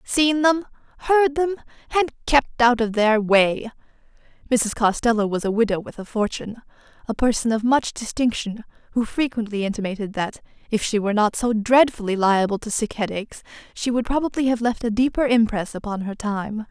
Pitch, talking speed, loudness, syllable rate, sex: 230 Hz, 165 wpm, -21 LUFS, 5.4 syllables/s, female